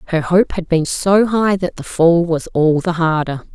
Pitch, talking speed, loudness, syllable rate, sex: 170 Hz, 220 wpm, -16 LUFS, 4.3 syllables/s, female